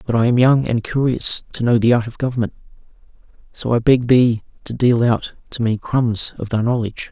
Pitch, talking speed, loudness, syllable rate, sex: 120 Hz, 210 wpm, -18 LUFS, 5.4 syllables/s, male